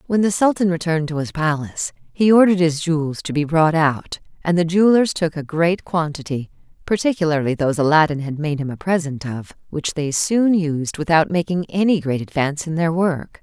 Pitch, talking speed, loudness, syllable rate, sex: 160 Hz, 190 wpm, -19 LUFS, 5.5 syllables/s, female